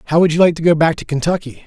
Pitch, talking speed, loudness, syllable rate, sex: 160 Hz, 325 wpm, -15 LUFS, 7.6 syllables/s, male